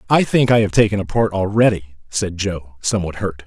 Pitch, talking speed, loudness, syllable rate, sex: 100 Hz, 210 wpm, -18 LUFS, 5.5 syllables/s, male